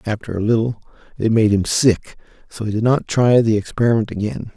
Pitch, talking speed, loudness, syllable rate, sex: 110 Hz, 195 wpm, -18 LUFS, 5.6 syllables/s, male